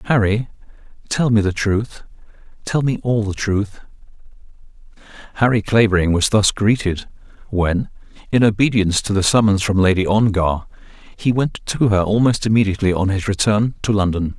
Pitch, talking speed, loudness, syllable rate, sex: 105 Hz, 140 wpm, -17 LUFS, 5.2 syllables/s, male